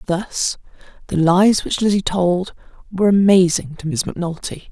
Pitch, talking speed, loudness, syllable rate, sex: 185 Hz, 140 wpm, -17 LUFS, 4.6 syllables/s, female